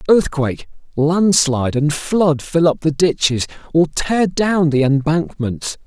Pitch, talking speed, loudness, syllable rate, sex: 155 Hz, 135 wpm, -17 LUFS, 4.0 syllables/s, male